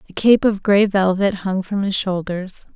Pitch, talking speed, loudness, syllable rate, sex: 195 Hz, 195 wpm, -18 LUFS, 4.4 syllables/s, female